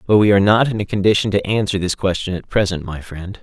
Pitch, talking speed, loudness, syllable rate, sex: 100 Hz, 265 wpm, -17 LUFS, 6.4 syllables/s, male